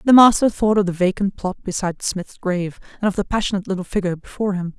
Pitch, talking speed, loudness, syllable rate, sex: 195 Hz, 225 wpm, -20 LUFS, 7.0 syllables/s, female